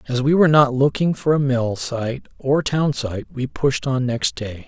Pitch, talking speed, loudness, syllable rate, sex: 130 Hz, 220 wpm, -20 LUFS, 4.3 syllables/s, male